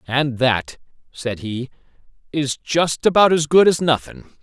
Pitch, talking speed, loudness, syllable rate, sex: 135 Hz, 150 wpm, -18 LUFS, 4.1 syllables/s, male